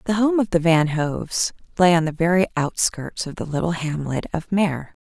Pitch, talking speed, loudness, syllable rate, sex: 170 Hz, 205 wpm, -21 LUFS, 5.0 syllables/s, female